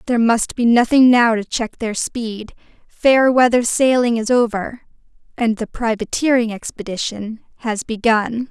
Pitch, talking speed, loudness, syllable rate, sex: 230 Hz, 140 wpm, -17 LUFS, 4.4 syllables/s, female